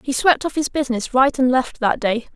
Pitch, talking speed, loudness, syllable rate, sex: 260 Hz, 255 wpm, -19 LUFS, 5.4 syllables/s, female